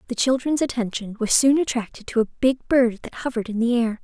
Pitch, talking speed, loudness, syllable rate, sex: 240 Hz, 225 wpm, -22 LUFS, 5.8 syllables/s, female